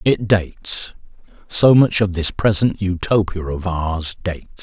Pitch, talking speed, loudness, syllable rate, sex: 95 Hz, 130 wpm, -18 LUFS, 4.0 syllables/s, male